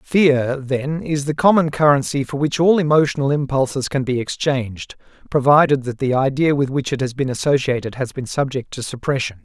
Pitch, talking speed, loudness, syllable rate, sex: 135 Hz, 185 wpm, -18 LUFS, 5.4 syllables/s, male